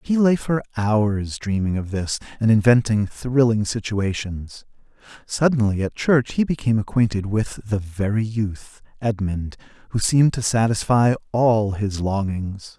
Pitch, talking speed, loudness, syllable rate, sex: 110 Hz, 135 wpm, -21 LUFS, 4.3 syllables/s, male